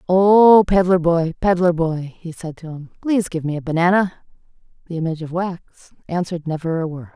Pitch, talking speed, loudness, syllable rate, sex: 170 Hz, 185 wpm, -18 LUFS, 5.4 syllables/s, female